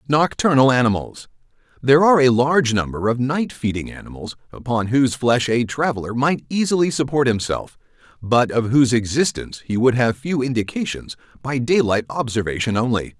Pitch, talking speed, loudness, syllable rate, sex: 125 Hz, 145 wpm, -19 LUFS, 5.6 syllables/s, male